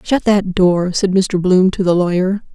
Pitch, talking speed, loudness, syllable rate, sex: 185 Hz, 210 wpm, -15 LUFS, 4.2 syllables/s, female